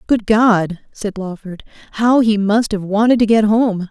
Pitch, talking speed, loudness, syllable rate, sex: 210 Hz, 185 wpm, -15 LUFS, 4.3 syllables/s, female